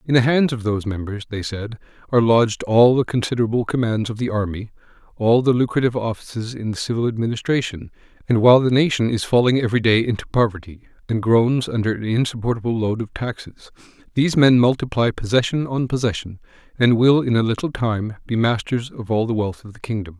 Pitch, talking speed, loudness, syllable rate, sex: 115 Hz, 190 wpm, -19 LUFS, 6.1 syllables/s, male